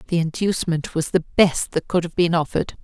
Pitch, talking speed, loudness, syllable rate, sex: 170 Hz, 210 wpm, -21 LUFS, 5.8 syllables/s, female